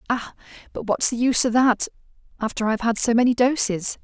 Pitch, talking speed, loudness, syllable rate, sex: 235 Hz, 210 wpm, -21 LUFS, 6.2 syllables/s, female